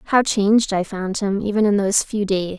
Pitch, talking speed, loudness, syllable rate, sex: 205 Hz, 230 wpm, -19 LUFS, 5.5 syllables/s, female